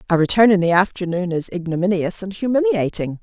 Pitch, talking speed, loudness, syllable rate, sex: 190 Hz, 165 wpm, -18 LUFS, 6.0 syllables/s, female